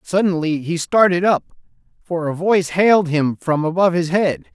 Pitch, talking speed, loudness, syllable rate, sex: 175 Hz, 170 wpm, -17 LUFS, 5.2 syllables/s, male